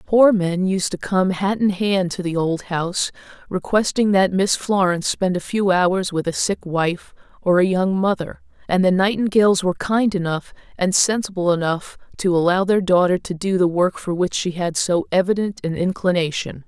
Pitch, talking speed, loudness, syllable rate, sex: 185 Hz, 190 wpm, -19 LUFS, 4.9 syllables/s, female